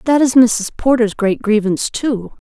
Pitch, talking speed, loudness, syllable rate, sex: 230 Hz, 170 wpm, -15 LUFS, 4.5 syllables/s, female